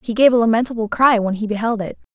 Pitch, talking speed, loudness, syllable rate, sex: 225 Hz, 250 wpm, -17 LUFS, 6.8 syllables/s, female